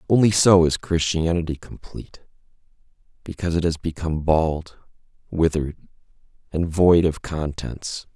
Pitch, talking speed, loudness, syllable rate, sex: 80 Hz, 110 wpm, -21 LUFS, 4.9 syllables/s, male